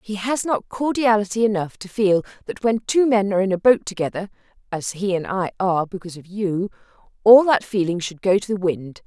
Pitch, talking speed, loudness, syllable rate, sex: 200 Hz, 210 wpm, -20 LUFS, 5.6 syllables/s, female